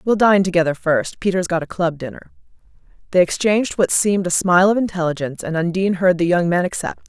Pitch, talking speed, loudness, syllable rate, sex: 180 Hz, 195 wpm, -18 LUFS, 6.4 syllables/s, female